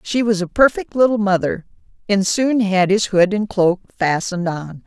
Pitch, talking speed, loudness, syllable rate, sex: 200 Hz, 185 wpm, -17 LUFS, 4.8 syllables/s, female